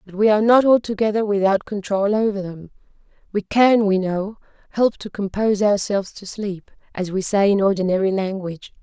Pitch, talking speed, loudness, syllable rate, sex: 200 Hz, 170 wpm, -19 LUFS, 5.5 syllables/s, female